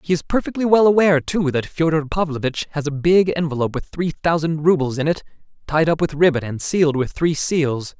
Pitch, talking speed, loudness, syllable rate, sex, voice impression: 155 Hz, 210 wpm, -19 LUFS, 5.7 syllables/s, male, masculine, slightly adult-like, fluent, refreshing, slightly sincere, lively